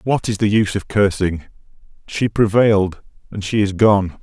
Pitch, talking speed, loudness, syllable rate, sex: 100 Hz, 155 wpm, -17 LUFS, 4.9 syllables/s, male